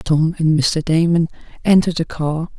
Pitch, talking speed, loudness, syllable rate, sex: 160 Hz, 160 wpm, -17 LUFS, 4.9 syllables/s, female